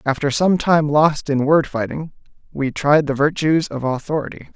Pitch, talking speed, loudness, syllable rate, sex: 145 Hz, 170 wpm, -18 LUFS, 4.7 syllables/s, male